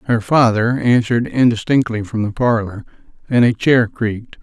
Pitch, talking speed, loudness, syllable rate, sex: 115 Hz, 150 wpm, -16 LUFS, 5.0 syllables/s, male